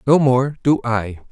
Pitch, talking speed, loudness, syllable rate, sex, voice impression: 125 Hz, 180 wpm, -18 LUFS, 4.1 syllables/s, male, very masculine, adult-like, slightly middle-aged, thick, tensed, very powerful, very bright, slightly soft, very clear, very fluent, cool, intellectual, very refreshing, very sincere, calm, slightly mature, very friendly, very reassuring, very unique, slightly elegant, wild, sweet, very lively, kind, slightly intense, light